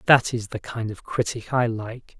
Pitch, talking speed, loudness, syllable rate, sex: 115 Hz, 220 wpm, -25 LUFS, 4.4 syllables/s, male